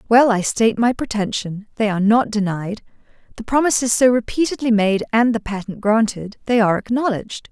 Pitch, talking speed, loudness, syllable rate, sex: 220 Hz, 160 wpm, -18 LUFS, 5.7 syllables/s, female